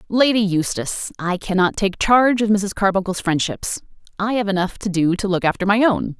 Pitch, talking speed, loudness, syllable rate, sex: 200 Hz, 195 wpm, -19 LUFS, 5.4 syllables/s, female